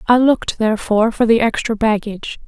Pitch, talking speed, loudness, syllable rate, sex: 225 Hz, 170 wpm, -16 LUFS, 6.1 syllables/s, female